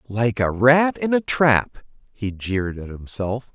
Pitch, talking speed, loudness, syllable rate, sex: 120 Hz, 170 wpm, -20 LUFS, 3.9 syllables/s, male